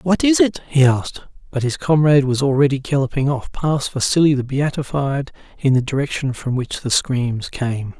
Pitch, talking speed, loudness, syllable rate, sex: 140 Hz, 180 wpm, -18 LUFS, 5.1 syllables/s, male